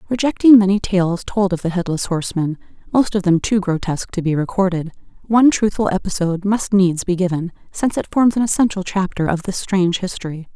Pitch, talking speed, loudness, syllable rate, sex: 190 Hz, 175 wpm, -18 LUFS, 5.9 syllables/s, female